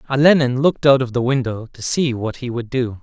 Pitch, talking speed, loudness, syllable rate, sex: 130 Hz, 240 wpm, -18 LUFS, 5.7 syllables/s, male